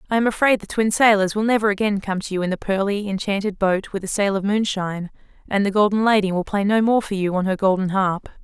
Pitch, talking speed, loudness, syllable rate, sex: 200 Hz, 255 wpm, -20 LUFS, 6.2 syllables/s, female